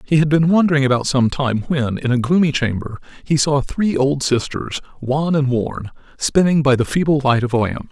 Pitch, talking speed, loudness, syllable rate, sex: 135 Hz, 210 wpm, -17 LUFS, 5.1 syllables/s, male